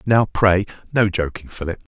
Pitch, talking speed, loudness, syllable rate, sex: 100 Hz, 155 wpm, -20 LUFS, 4.9 syllables/s, male